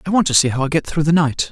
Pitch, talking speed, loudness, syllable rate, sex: 155 Hz, 395 wpm, -16 LUFS, 7.2 syllables/s, male